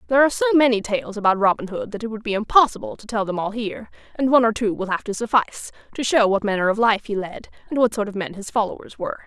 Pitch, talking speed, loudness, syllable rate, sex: 220 Hz, 270 wpm, -21 LUFS, 7.0 syllables/s, female